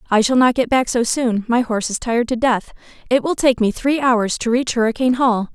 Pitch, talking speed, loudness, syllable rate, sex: 240 Hz, 250 wpm, -17 LUFS, 5.7 syllables/s, female